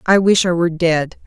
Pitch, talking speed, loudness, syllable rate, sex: 175 Hz, 235 wpm, -15 LUFS, 5.5 syllables/s, female